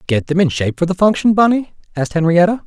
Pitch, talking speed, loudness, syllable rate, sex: 180 Hz, 225 wpm, -15 LUFS, 7.0 syllables/s, male